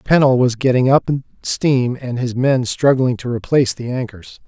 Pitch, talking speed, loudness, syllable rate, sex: 125 Hz, 175 wpm, -17 LUFS, 4.8 syllables/s, male